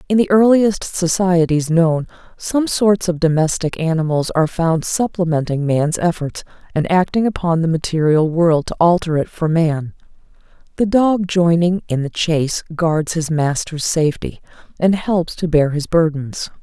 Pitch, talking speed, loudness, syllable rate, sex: 170 Hz, 150 wpm, -17 LUFS, 4.5 syllables/s, female